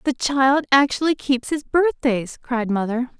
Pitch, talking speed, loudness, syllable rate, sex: 265 Hz, 150 wpm, -20 LUFS, 4.1 syllables/s, female